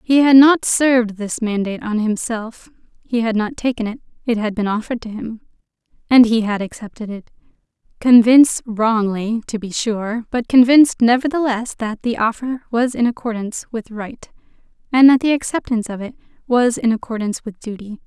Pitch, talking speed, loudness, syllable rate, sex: 230 Hz, 170 wpm, -17 LUFS, 5.3 syllables/s, female